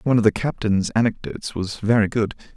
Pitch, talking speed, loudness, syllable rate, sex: 110 Hz, 190 wpm, -21 LUFS, 6.2 syllables/s, male